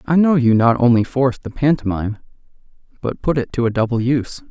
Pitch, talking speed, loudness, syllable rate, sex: 130 Hz, 200 wpm, -17 LUFS, 6.2 syllables/s, male